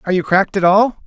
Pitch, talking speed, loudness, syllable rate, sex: 190 Hz, 280 wpm, -14 LUFS, 7.4 syllables/s, male